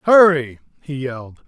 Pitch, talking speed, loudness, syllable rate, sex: 145 Hz, 120 wpm, -17 LUFS, 4.5 syllables/s, male